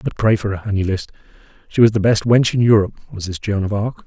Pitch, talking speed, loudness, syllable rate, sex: 105 Hz, 280 wpm, -17 LUFS, 6.5 syllables/s, male